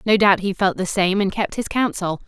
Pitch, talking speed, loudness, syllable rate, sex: 195 Hz, 265 wpm, -20 LUFS, 5.2 syllables/s, female